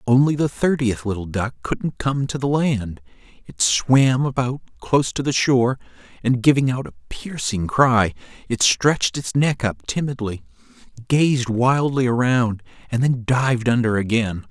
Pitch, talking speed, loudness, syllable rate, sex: 125 Hz, 155 wpm, -20 LUFS, 4.4 syllables/s, male